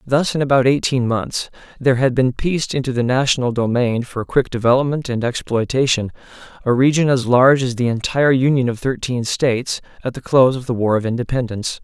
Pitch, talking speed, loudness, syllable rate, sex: 125 Hz, 190 wpm, -18 LUFS, 5.9 syllables/s, male